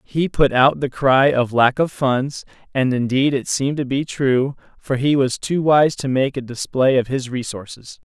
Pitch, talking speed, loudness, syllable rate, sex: 135 Hz, 205 wpm, -18 LUFS, 4.4 syllables/s, male